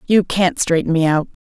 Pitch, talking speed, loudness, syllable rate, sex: 170 Hz, 210 wpm, -16 LUFS, 5.3 syllables/s, female